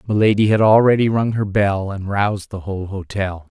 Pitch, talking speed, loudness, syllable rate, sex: 100 Hz, 185 wpm, -18 LUFS, 5.4 syllables/s, male